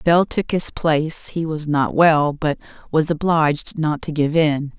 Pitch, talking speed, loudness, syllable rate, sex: 155 Hz, 190 wpm, -19 LUFS, 4.2 syllables/s, female